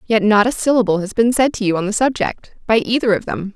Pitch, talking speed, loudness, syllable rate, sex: 220 Hz, 270 wpm, -17 LUFS, 6.1 syllables/s, female